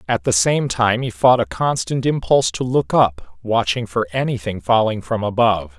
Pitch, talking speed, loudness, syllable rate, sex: 110 Hz, 185 wpm, -18 LUFS, 4.8 syllables/s, male